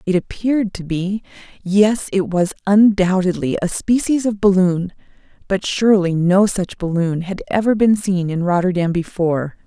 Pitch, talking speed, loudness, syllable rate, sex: 190 Hz, 145 wpm, -17 LUFS, 4.7 syllables/s, female